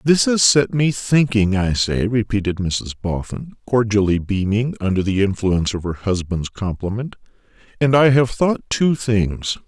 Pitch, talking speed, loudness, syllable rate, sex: 110 Hz, 155 wpm, -18 LUFS, 4.5 syllables/s, male